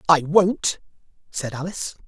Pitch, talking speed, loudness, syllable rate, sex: 165 Hz, 115 wpm, -22 LUFS, 4.6 syllables/s, male